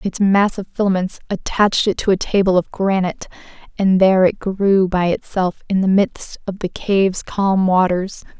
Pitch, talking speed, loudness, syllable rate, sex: 190 Hz, 180 wpm, -17 LUFS, 4.8 syllables/s, female